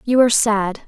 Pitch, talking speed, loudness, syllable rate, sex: 220 Hz, 205 wpm, -16 LUFS, 5.4 syllables/s, female